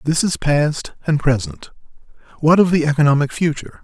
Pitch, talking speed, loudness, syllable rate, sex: 155 Hz, 155 wpm, -17 LUFS, 5.6 syllables/s, male